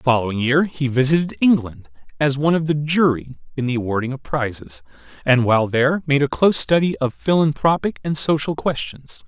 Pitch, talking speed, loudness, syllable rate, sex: 140 Hz, 180 wpm, -19 LUFS, 5.7 syllables/s, male